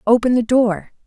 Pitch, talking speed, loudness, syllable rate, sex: 230 Hz, 170 wpm, -16 LUFS, 4.8 syllables/s, female